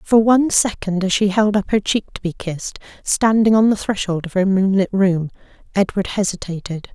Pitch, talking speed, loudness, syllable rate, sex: 195 Hz, 190 wpm, -18 LUFS, 5.3 syllables/s, female